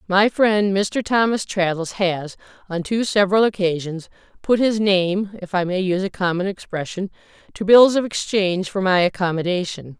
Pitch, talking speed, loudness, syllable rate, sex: 190 Hz, 160 wpm, -19 LUFS, 4.9 syllables/s, female